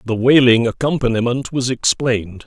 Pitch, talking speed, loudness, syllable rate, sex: 120 Hz, 120 wpm, -16 LUFS, 5.2 syllables/s, male